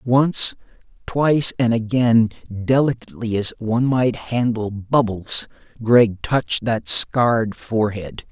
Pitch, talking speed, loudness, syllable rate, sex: 115 Hz, 110 wpm, -19 LUFS, 3.9 syllables/s, male